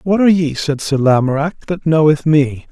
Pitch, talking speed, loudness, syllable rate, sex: 155 Hz, 200 wpm, -14 LUFS, 5.0 syllables/s, male